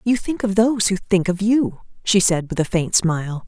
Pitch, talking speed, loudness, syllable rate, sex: 195 Hz, 240 wpm, -19 LUFS, 5.1 syllables/s, female